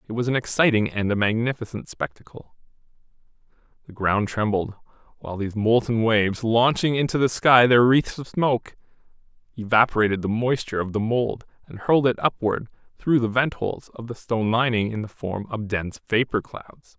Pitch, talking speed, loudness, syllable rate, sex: 115 Hz, 170 wpm, -22 LUFS, 5.6 syllables/s, male